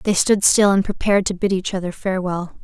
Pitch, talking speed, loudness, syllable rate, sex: 190 Hz, 225 wpm, -18 LUFS, 6.0 syllables/s, female